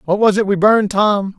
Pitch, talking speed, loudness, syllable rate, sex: 200 Hz, 260 wpm, -14 LUFS, 5.5 syllables/s, male